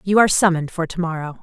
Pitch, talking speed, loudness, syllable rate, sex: 175 Hz, 255 wpm, -19 LUFS, 7.6 syllables/s, female